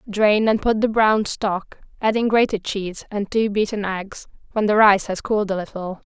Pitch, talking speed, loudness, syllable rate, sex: 205 Hz, 195 wpm, -20 LUFS, 4.9 syllables/s, female